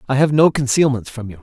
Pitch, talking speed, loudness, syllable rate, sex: 130 Hz, 250 wpm, -16 LUFS, 6.5 syllables/s, male